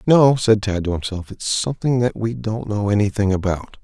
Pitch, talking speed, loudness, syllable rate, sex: 105 Hz, 205 wpm, -20 LUFS, 5.2 syllables/s, male